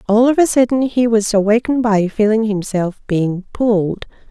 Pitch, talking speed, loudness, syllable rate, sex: 215 Hz, 165 wpm, -16 LUFS, 5.0 syllables/s, female